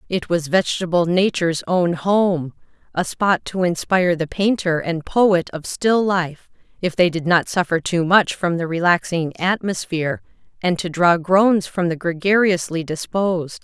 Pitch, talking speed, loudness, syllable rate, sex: 175 Hz, 150 wpm, -19 LUFS, 4.5 syllables/s, female